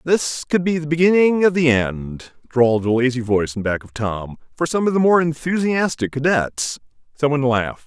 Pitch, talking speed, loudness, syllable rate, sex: 145 Hz, 190 wpm, -19 LUFS, 5.3 syllables/s, male